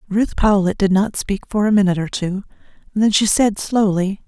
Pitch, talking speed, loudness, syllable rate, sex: 200 Hz, 195 wpm, -17 LUFS, 5.0 syllables/s, female